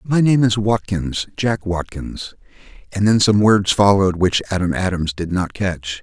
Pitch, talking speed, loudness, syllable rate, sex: 100 Hz, 160 wpm, -18 LUFS, 4.3 syllables/s, male